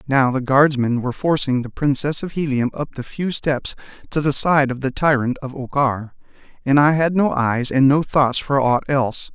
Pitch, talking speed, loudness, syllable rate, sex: 135 Hz, 205 wpm, -19 LUFS, 4.9 syllables/s, male